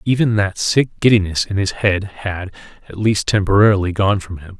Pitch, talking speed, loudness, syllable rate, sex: 100 Hz, 185 wpm, -17 LUFS, 5.3 syllables/s, male